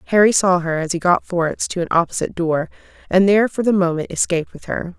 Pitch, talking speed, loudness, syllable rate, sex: 180 Hz, 230 wpm, -18 LUFS, 6.7 syllables/s, female